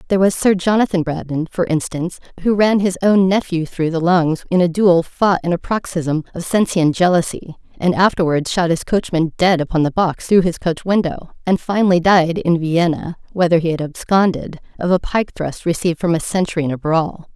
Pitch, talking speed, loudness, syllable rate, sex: 175 Hz, 200 wpm, -17 LUFS, 5.3 syllables/s, female